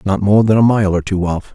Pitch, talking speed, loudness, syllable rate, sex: 100 Hz, 310 wpm, -14 LUFS, 5.5 syllables/s, male